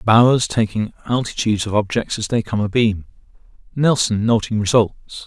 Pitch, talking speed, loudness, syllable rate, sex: 110 Hz, 135 wpm, -18 LUFS, 5.1 syllables/s, male